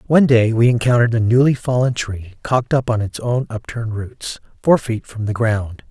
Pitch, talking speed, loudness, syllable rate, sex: 115 Hz, 205 wpm, -18 LUFS, 5.4 syllables/s, male